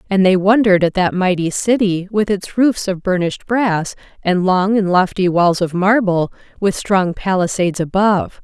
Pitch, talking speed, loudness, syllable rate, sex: 190 Hz, 170 wpm, -16 LUFS, 4.8 syllables/s, female